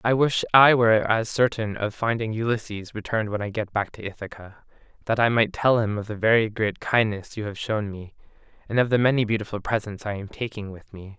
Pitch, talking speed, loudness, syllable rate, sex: 110 Hz, 220 wpm, -23 LUFS, 5.7 syllables/s, male